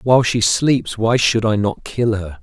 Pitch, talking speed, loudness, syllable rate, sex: 110 Hz, 220 wpm, -17 LUFS, 4.3 syllables/s, male